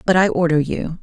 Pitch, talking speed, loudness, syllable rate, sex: 165 Hz, 235 wpm, -18 LUFS, 5.7 syllables/s, female